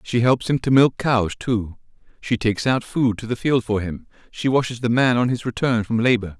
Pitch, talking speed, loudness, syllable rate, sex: 120 Hz, 235 wpm, -20 LUFS, 5.2 syllables/s, male